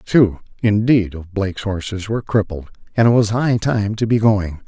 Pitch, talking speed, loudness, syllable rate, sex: 105 Hz, 195 wpm, -18 LUFS, 4.9 syllables/s, male